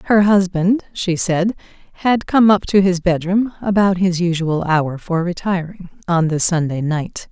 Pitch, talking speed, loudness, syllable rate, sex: 180 Hz, 165 wpm, -17 LUFS, 4.3 syllables/s, female